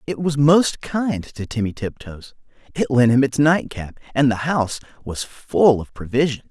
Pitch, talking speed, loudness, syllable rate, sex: 130 Hz, 175 wpm, -19 LUFS, 4.5 syllables/s, male